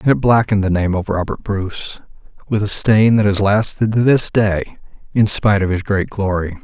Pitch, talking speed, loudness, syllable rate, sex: 105 Hz, 210 wpm, -16 LUFS, 5.2 syllables/s, male